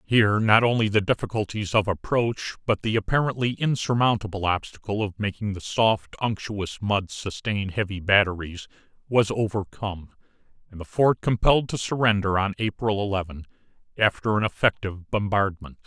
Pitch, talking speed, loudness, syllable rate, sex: 105 Hz, 135 wpm, -24 LUFS, 5.3 syllables/s, male